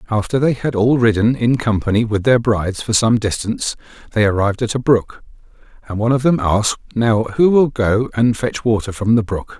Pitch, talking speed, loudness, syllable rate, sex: 115 Hz, 205 wpm, -16 LUFS, 5.6 syllables/s, male